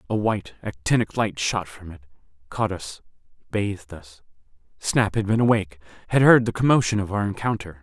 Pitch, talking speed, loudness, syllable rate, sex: 100 Hz, 160 wpm, -22 LUFS, 5.6 syllables/s, male